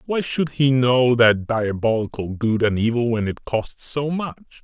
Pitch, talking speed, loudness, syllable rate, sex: 125 Hz, 180 wpm, -20 LUFS, 4.0 syllables/s, male